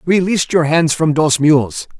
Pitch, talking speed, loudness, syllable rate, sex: 155 Hz, 180 wpm, -14 LUFS, 4.4 syllables/s, male